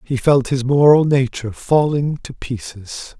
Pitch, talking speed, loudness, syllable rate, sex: 135 Hz, 150 wpm, -16 LUFS, 4.3 syllables/s, male